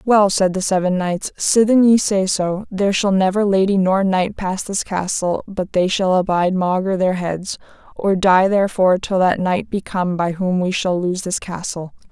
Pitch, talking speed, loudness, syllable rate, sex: 190 Hz, 200 wpm, -18 LUFS, 4.7 syllables/s, female